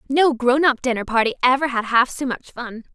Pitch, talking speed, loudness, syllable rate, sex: 255 Hz, 225 wpm, -19 LUFS, 5.4 syllables/s, female